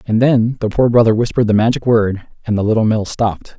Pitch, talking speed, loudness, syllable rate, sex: 110 Hz, 235 wpm, -15 LUFS, 6.2 syllables/s, male